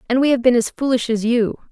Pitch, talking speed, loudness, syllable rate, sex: 245 Hz, 280 wpm, -18 LUFS, 6.3 syllables/s, female